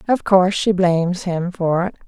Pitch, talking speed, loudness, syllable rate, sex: 185 Hz, 205 wpm, -18 LUFS, 5.0 syllables/s, female